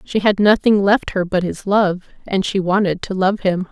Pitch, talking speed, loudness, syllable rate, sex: 195 Hz, 225 wpm, -17 LUFS, 4.7 syllables/s, female